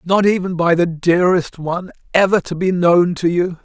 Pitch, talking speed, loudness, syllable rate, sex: 175 Hz, 200 wpm, -16 LUFS, 5.2 syllables/s, male